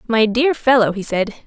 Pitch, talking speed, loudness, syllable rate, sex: 235 Hz, 205 wpm, -16 LUFS, 5.0 syllables/s, female